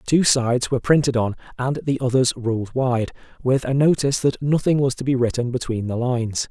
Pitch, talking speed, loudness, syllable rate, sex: 130 Hz, 205 wpm, -21 LUFS, 5.6 syllables/s, male